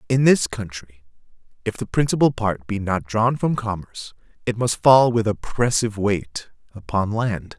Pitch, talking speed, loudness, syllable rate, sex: 110 Hz, 160 wpm, -21 LUFS, 4.6 syllables/s, male